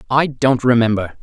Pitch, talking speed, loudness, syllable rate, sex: 125 Hz, 145 wpm, -16 LUFS, 5.0 syllables/s, male